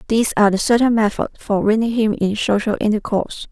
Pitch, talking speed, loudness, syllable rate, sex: 215 Hz, 190 wpm, -18 LUFS, 6.3 syllables/s, female